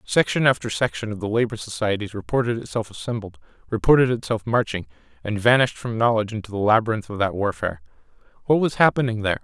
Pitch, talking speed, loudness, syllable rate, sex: 110 Hz, 170 wpm, -22 LUFS, 6.7 syllables/s, male